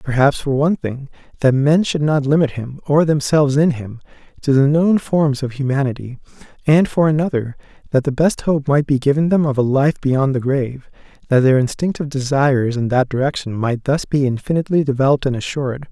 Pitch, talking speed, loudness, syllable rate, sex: 140 Hz, 190 wpm, -17 LUFS, 5.8 syllables/s, male